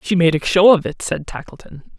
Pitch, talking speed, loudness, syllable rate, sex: 175 Hz, 240 wpm, -16 LUFS, 5.4 syllables/s, female